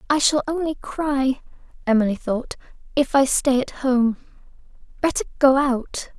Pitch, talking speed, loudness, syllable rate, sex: 265 Hz, 135 wpm, -21 LUFS, 4.4 syllables/s, female